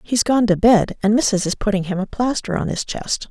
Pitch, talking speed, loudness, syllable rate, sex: 210 Hz, 255 wpm, -18 LUFS, 5.4 syllables/s, female